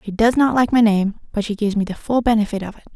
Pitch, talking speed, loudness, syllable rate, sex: 215 Hz, 305 wpm, -18 LUFS, 6.9 syllables/s, female